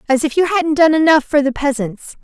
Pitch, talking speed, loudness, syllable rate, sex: 290 Hz, 240 wpm, -15 LUFS, 5.5 syllables/s, female